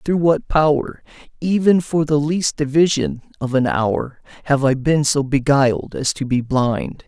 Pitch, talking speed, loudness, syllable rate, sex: 145 Hz, 170 wpm, -18 LUFS, 4.2 syllables/s, male